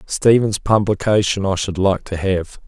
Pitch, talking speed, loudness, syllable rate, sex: 100 Hz, 155 wpm, -17 LUFS, 4.4 syllables/s, male